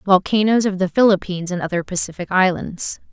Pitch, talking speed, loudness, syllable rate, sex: 190 Hz, 155 wpm, -18 LUFS, 5.9 syllables/s, female